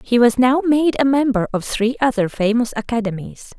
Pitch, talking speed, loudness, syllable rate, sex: 240 Hz, 185 wpm, -17 LUFS, 5.1 syllables/s, female